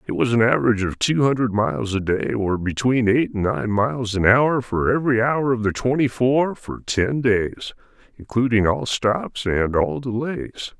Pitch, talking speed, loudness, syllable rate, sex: 120 Hz, 190 wpm, -20 LUFS, 4.8 syllables/s, male